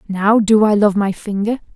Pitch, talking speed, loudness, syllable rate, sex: 210 Hz, 205 wpm, -15 LUFS, 4.7 syllables/s, female